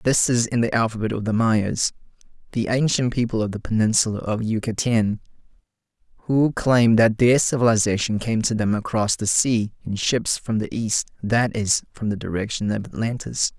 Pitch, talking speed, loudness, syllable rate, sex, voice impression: 110 Hz, 170 wpm, -21 LUFS, 5.0 syllables/s, male, masculine, adult-like, slightly tensed, raspy, calm, friendly, reassuring, slightly wild, kind, slightly modest